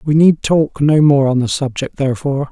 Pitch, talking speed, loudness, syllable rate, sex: 140 Hz, 215 wpm, -14 LUFS, 5.4 syllables/s, male